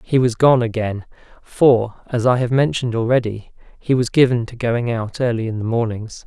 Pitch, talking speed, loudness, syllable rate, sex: 120 Hz, 190 wpm, -18 LUFS, 5.1 syllables/s, male